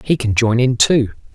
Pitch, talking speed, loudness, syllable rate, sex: 120 Hz, 225 wpm, -15 LUFS, 4.9 syllables/s, male